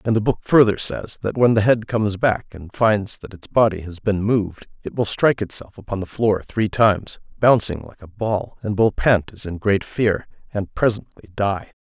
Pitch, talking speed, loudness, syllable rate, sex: 105 Hz, 205 wpm, -20 LUFS, 4.9 syllables/s, male